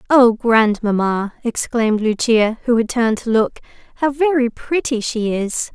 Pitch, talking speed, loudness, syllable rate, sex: 235 Hz, 145 wpm, -17 LUFS, 4.5 syllables/s, female